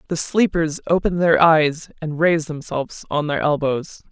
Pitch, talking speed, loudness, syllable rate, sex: 160 Hz, 160 wpm, -19 LUFS, 4.7 syllables/s, female